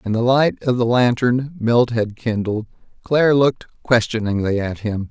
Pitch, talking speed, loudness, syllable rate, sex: 120 Hz, 165 wpm, -18 LUFS, 4.6 syllables/s, male